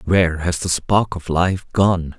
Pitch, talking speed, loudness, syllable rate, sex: 90 Hz, 195 wpm, -19 LUFS, 3.9 syllables/s, male